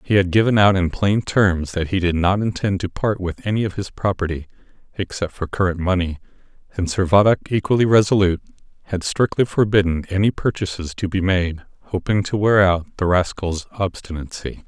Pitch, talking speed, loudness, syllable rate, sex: 95 Hz, 170 wpm, -20 LUFS, 5.5 syllables/s, male